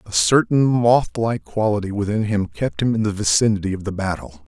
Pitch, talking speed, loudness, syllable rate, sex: 105 Hz, 185 wpm, -19 LUFS, 5.5 syllables/s, male